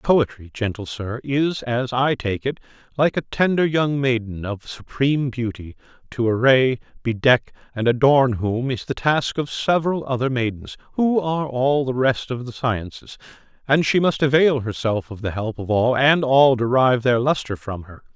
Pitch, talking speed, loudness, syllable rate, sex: 125 Hz, 180 wpm, -20 LUFS, 4.7 syllables/s, male